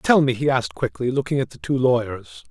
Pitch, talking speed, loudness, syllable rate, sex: 125 Hz, 240 wpm, -21 LUFS, 5.8 syllables/s, male